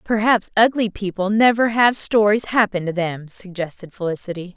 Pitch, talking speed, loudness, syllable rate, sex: 200 Hz, 145 wpm, -19 LUFS, 5.0 syllables/s, female